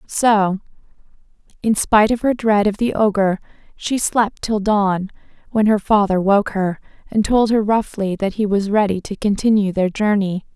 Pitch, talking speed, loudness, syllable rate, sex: 205 Hz, 170 wpm, -18 LUFS, 4.6 syllables/s, female